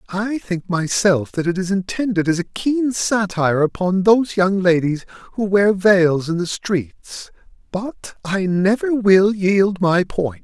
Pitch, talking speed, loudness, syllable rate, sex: 190 Hz, 160 wpm, -18 LUFS, 3.9 syllables/s, male